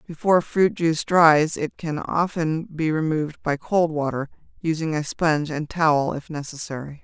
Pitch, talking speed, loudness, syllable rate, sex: 155 Hz, 160 wpm, -22 LUFS, 4.9 syllables/s, female